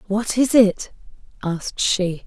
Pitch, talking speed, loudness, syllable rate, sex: 205 Hz, 130 wpm, -19 LUFS, 3.8 syllables/s, female